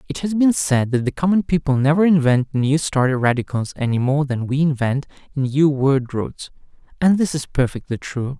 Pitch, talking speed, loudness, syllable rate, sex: 140 Hz, 185 wpm, -19 LUFS, 5.0 syllables/s, male